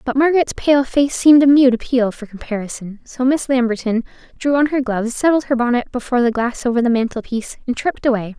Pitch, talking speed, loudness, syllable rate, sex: 250 Hz, 215 wpm, -17 LUFS, 6.2 syllables/s, female